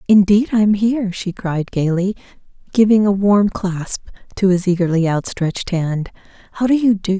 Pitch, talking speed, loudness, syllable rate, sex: 195 Hz, 160 wpm, -17 LUFS, 4.8 syllables/s, female